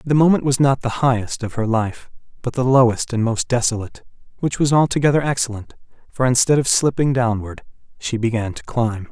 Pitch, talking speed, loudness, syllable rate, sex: 120 Hz, 185 wpm, -19 LUFS, 5.6 syllables/s, male